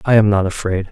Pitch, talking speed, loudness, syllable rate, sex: 100 Hz, 260 wpm, -16 LUFS, 6.3 syllables/s, male